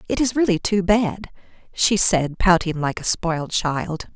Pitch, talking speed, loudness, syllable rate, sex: 185 Hz, 175 wpm, -20 LUFS, 4.2 syllables/s, female